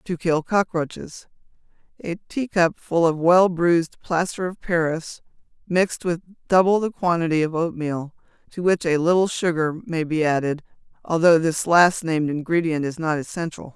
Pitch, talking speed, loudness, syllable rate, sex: 165 Hz, 145 wpm, -21 LUFS, 4.9 syllables/s, female